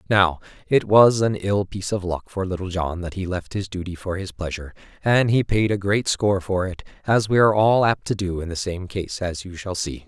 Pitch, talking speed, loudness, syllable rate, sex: 95 Hz, 250 wpm, -22 LUFS, 5.4 syllables/s, male